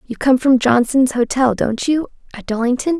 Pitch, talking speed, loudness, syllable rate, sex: 255 Hz, 140 wpm, -16 LUFS, 4.8 syllables/s, female